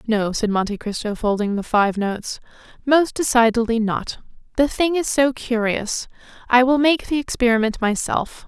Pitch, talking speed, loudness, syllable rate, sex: 235 Hz, 155 wpm, -20 LUFS, 4.8 syllables/s, female